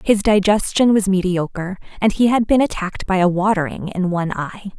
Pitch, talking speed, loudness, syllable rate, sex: 195 Hz, 190 wpm, -18 LUFS, 5.6 syllables/s, female